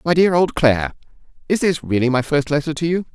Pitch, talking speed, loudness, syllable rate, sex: 150 Hz, 210 wpm, -18 LUFS, 6.1 syllables/s, male